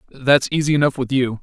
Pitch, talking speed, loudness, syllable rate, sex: 135 Hz, 210 wpm, -18 LUFS, 5.9 syllables/s, male